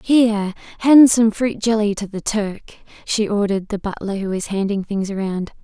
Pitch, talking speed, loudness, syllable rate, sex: 210 Hz, 180 wpm, -18 LUFS, 4.9 syllables/s, female